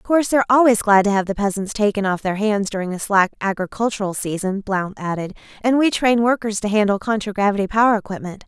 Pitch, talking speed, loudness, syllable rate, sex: 210 Hz, 205 wpm, -19 LUFS, 6.2 syllables/s, female